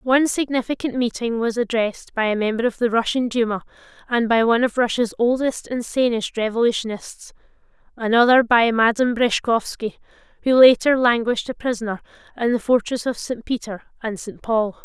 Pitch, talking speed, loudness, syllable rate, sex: 235 Hz, 160 wpm, -20 LUFS, 5.6 syllables/s, female